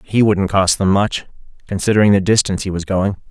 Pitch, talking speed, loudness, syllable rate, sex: 100 Hz, 200 wpm, -16 LUFS, 5.9 syllables/s, male